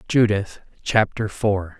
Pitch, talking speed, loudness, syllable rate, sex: 105 Hz, 100 wpm, -21 LUFS, 3.5 syllables/s, male